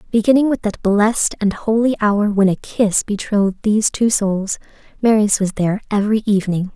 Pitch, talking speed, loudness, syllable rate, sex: 210 Hz, 170 wpm, -17 LUFS, 5.6 syllables/s, female